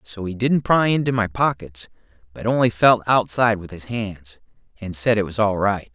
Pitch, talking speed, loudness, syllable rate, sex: 105 Hz, 200 wpm, -20 LUFS, 5.0 syllables/s, male